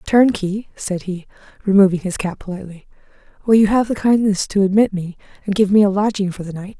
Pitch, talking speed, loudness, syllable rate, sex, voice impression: 200 Hz, 205 wpm, -17 LUFS, 5.9 syllables/s, female, feminine, adult-like, relaxed, weak, soft, raspy, slightly intellectual, reassuring, slightly strict, modest